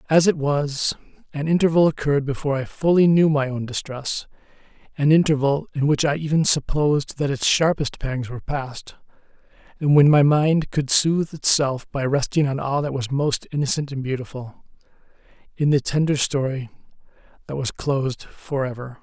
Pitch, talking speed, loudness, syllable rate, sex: 145 Hz, 165 wpm, -21 LUFS, 5.2 syllables/s, male